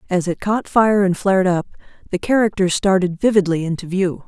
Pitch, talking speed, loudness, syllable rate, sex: 190 Hz, 185 wpm, -18 LUFS, 5.5 syllables/s, female